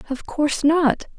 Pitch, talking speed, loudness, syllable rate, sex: 295 Hz, 150 wpm, -20 LUFS, 4.6 syllables/s, female